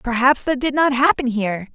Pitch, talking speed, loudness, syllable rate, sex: 250 Hz, 205 wpm, -18 LUFS, 5.6 syllables/s, female